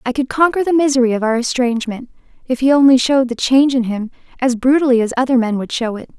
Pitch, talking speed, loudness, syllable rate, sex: 255 Hz, 235 wpm, -15 LUFS, 6.7 syllables/s, female